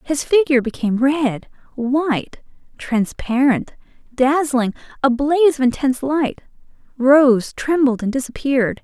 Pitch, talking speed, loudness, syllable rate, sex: 265 Hz, 95 wpm, -18 LUFS, 4.5 syllables/s, female